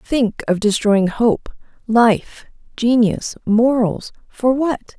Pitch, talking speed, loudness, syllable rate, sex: 230 Hz, 95 wpm, -17 LUFS, 3.1 syllables/s, female